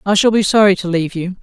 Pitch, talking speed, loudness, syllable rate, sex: 190 Hz, 295 wpm, -14 LUFS, 6.9 syllables/s, female